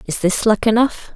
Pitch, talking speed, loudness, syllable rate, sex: 215 Hz, 210 wpm, -16 LUFS, 5.0 syllables/s, female